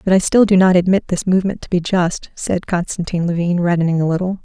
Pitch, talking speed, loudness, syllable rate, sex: 180 Hz, 230 wpm, -16 LUFS, 6.1 syllables/s, female